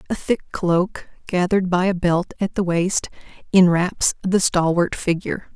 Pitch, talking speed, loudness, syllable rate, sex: 180 Hz, 150 wpm, -20 LUFS, 4.4 syllables/s, female